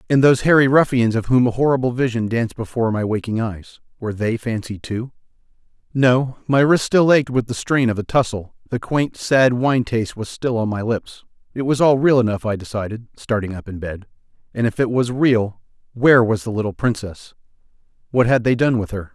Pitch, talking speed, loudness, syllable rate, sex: 120 Hz, 205 wpm, -19 LUFS, 5.5 syllables/s, male